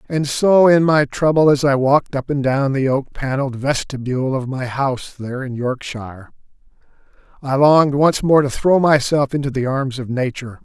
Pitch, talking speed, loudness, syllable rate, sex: 135 Hz, 185 wpm, -17 LUFS, 5.3 syllables/s, male